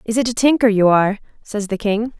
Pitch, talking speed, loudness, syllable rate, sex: 215 Hz, 245 wpm, -17 LUFS, 6.1 syllables/s, female